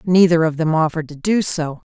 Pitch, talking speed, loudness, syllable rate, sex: 165 Hz, 220 wpm, -17 LUFS, 5.9 syllables/s, female